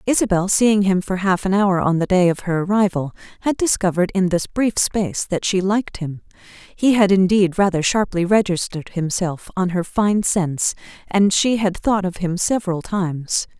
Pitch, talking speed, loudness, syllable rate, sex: 190 Hz, 185 wpm, -19 LUFS, 5.1 syllables/s, female